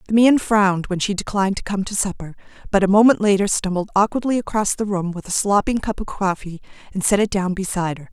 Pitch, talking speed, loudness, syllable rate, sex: 195 Hz, 230 wpm, -19 LUFS, 6.3 syllables/s, female